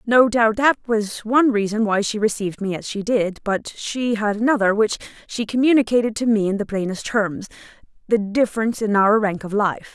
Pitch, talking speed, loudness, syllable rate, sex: 215 Hz, 195 wpm, -20 LUFS, 5.3 syllables/s, female